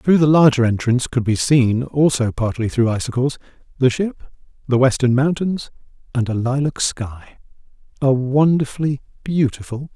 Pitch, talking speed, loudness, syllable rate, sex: 130 Hz, 145 wpm, -18 LUFS, 5.2 syllables/s, male